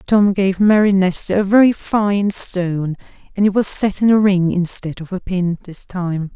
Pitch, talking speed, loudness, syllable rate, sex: 190 Hz, 200 wpm, -16 LUFS, 4.6 syllables/s, female